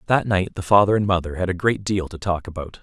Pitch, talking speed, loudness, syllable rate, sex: 95 Hz, 275 wpm, -21 LUFS, 6.2 syllables/s, male